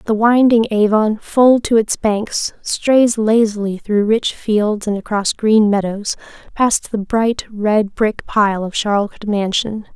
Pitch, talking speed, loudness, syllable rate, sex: 215 Hz, 150 wpm, -16 LUFS, 3.7 syllables/s, female